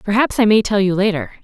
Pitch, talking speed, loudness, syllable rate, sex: 205 Hz, 250 wpm, -16 LUFS, 6.3 syllables/s, female